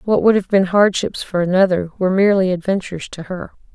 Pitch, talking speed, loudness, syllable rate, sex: 190 Hz, 190 wpm, -17 LUFS, 6.3 syllables/s, female